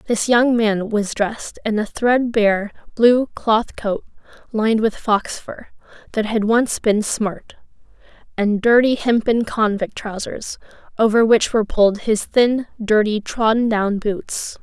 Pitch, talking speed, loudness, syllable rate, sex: 220 Hz, 145 wpm, -18 LUFS, 4.0 syllables/s, female